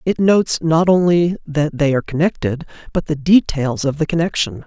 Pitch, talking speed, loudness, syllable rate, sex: 160 Hz, 180 wpm, -17 LUFS, 5.3 syllables/s, male